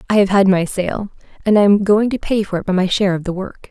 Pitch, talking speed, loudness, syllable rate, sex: 195 Hz, 305 wpm, -16 LUFS, 6.3 syllables/s, female